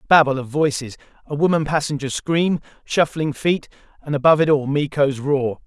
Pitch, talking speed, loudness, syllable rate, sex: 145 Hz, 170 wpm, -20 LUFS, 5.4 syllables/s, male